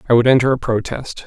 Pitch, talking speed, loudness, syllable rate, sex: 120 Hz, 240 wpm, -16 LUFS, 6.5 syllables/s, male